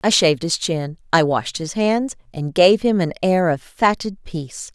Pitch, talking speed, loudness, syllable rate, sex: 175 Hz, 200 wpm, -19 LUFS, 4.5 syllables/s, female